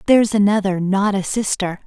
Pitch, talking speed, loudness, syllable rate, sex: 200 Hz, 160 wpm, -18 LUFS, 5.4 syllables/s, female